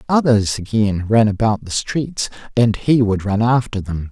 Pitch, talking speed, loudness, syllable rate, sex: 110 Hz, 175 wpm, -17 LUFS, 4.4 syllables/s, male